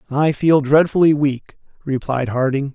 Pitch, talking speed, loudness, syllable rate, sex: 140 Hz, 130 wpm, -17 LUFS, 4.4 syllables/s, male